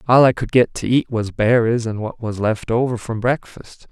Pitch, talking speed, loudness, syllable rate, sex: 115 Hz, 230 wpm, -19 LUFS, 4.8 syllables/s, male